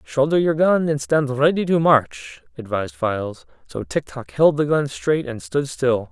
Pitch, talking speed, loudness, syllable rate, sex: 135 Hz, 195 wpm, -20 LUFS, 4.4 syllables/s, male